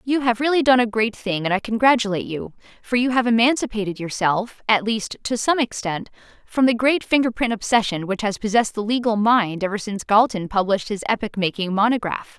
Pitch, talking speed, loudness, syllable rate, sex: 220 Hz, 200 wpm, -20 LUFS, 5.8 syllables/s, female